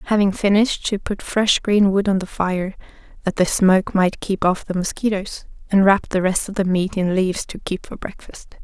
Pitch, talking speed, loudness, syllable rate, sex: 195 Hz, 215 wpm, -19 LUFS, 5.3 syllables/s, female